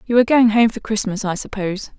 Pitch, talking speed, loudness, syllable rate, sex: 215 Hz, 240 wpm, -18 LUFS, 6.7 syllables/s, female